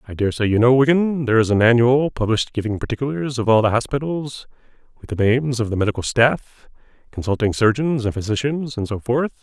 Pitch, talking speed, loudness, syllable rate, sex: 125 Hz, 190 wpm, -19 LUFS, 6.2 syllables/s, male